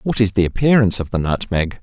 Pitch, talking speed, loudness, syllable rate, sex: 105 Hz, 230 wpm, -17 LUFS, 6.2 syllables/s, male